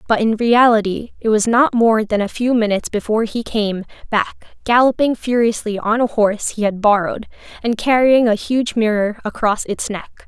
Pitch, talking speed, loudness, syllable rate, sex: 220 Hz, 180 wpm, -17 LUFS, 5.3 syllables/s, female